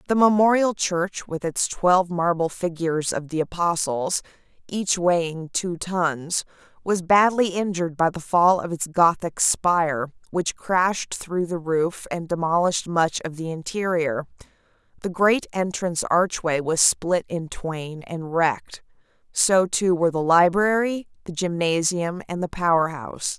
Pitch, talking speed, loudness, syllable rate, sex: 175 Hz, 145 wpm, -22 LUFS, 4.3 syllables/s, female